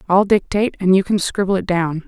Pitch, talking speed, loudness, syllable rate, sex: 190 Hz, 230 wpm, -17 LUFS, 5.9 syllables/s, female